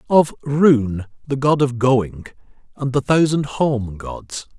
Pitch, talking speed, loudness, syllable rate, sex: 130 Hz, 145 wpm, -18 LUFS, 3.4 syllables/s, male